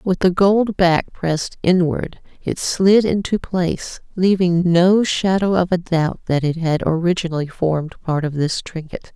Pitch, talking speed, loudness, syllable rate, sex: 175 Hz, 155 wpm, -18 LUFS, 4.2 syllables/s, female